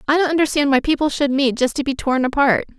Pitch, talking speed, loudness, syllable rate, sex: 280 Hz, 260 wpm, -18 LUFS, 6.4 syllables/s, female